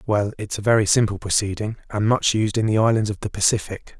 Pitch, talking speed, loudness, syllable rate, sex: 105 Hz, 225 wpm, -21 LUFS, 6.0 syllables/s, male